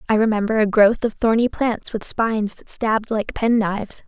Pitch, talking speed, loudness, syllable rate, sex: 220 Hz, 205 wpm, -20 LUFS, 5.2 syllables/s, female